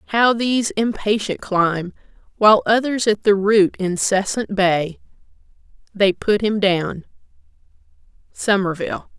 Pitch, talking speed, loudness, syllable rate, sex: 205 Hz, 100 wpm, -18 LUFS, 4.2 syllables/s, female